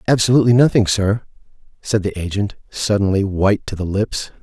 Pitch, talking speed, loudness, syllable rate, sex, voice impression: 105 Hz, 150 wpm, -17 LUFS, 5.7 syllables/s, male, very masculine, adult-like, slightly thick, sincere, slightly calm, slightly kind